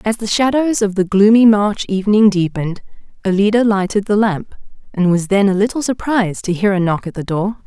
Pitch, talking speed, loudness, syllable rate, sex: 205 Hz, 205 wpm, -15 LUFS, 5.7 syllables/s, female